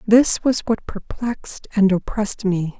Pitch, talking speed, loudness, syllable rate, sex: 210 Hz, 150 wpm, -20 LUFS, 4.4 syllables/s, female